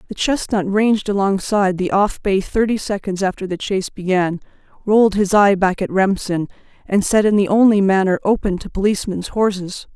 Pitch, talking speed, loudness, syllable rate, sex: 195 Hz, 175 wpm, -17 LUFS, 5.4 syllables/s, female